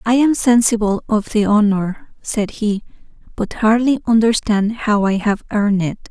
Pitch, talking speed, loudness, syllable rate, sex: 215 Hz, 155 wpm, -16 LUFS, 4.4 syllables/s, female